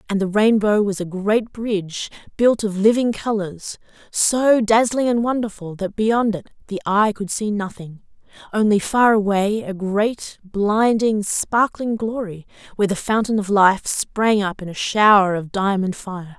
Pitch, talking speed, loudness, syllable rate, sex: 205 Hz, 160 wpm, -19 LUFS, 4.2 syllables/s, female